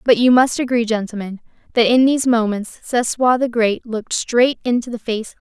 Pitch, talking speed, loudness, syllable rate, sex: 235 Hz, 210 wpm, -17 LUFS, 5.5 syllables/s, female